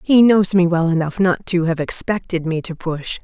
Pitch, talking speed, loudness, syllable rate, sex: 175 Hz, 220 wpm, -17 LUFS, 4.8 syllables/s, female